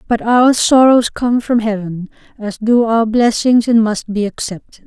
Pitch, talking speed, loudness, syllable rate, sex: 225 Hz, 175 wpm, -13 LUFS, 4.3 syllables/s, female